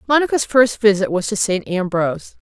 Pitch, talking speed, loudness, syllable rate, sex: 210 Hz, 170 wpm, -17 LUFS, 5.5 syllables/s, female